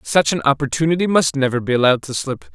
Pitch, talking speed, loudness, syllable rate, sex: 145 Hz, 210 wpm, -18 LUFS, 6.7 syllables/s, male